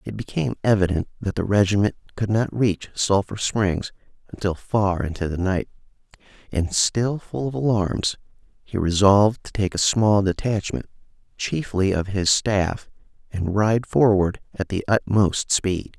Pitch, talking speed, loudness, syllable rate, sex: 100 Hz, 145 wpm, -22 LUFS, 4.4 syllables/s, male